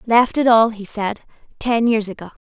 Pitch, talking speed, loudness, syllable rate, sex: 220 Hz, 200 wpm, -18 LUFS, 4.7 syllables/s, female